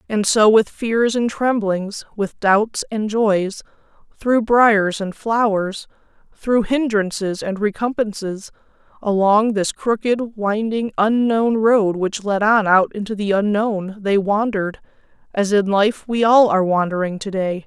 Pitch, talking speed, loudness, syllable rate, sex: 210 Hz, 145 wpm, -18 LUFS, 3.9 syllables/s, female